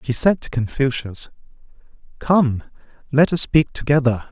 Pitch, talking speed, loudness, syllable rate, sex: 135 Hz, 125 wpm, -19 LUFS, 4.5 syllables/s, male